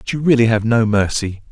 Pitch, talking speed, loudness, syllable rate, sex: 115 Hz, 240 wpm, -16 LUFS, 5.9 syllables/s, male